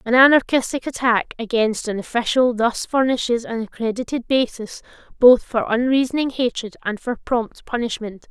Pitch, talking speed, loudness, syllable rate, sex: 240 Hz, 135 wpm, -20 LUFS, 5.0 syllables/s, female